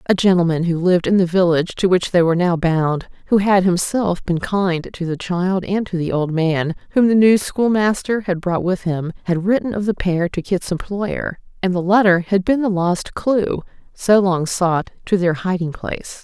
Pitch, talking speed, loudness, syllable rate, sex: 185 Hz, 210 wpm, -18 LUFS, 4.8 syllables/s, female